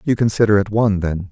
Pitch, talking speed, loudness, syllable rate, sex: 105 Hz, 230 wpm, -17 LUFS, 5.8 syllables/s, male